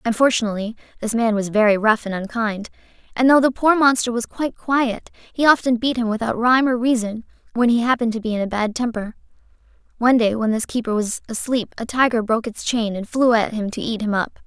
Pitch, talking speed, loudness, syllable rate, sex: 230 Hz, 220 wpm, -19 LUFS, 6.0 syllables/s, female